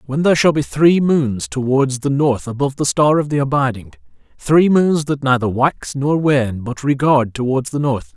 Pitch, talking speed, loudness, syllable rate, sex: 135 Hz, 200 wpm, -16 LUFS, 4.7 syllables/s, male